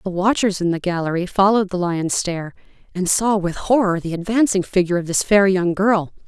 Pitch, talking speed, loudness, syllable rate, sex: 185 Hz, 200 wpm, -19 LUFS, 5.7 syllables/s, female